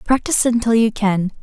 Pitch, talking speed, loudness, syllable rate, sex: 220 Hz, 170 wpm, -17 LUFS, 5.7 syllables/s, female